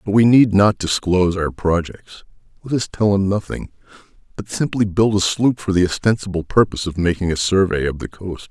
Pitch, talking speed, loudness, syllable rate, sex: 95 Hz, 200 wpm, -18 LUFS, 5.4 syllables/s, male